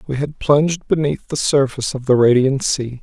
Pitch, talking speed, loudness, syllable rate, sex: 135 Hz, 200 wpm, -17 LUFS, 5.2 syllables/s, male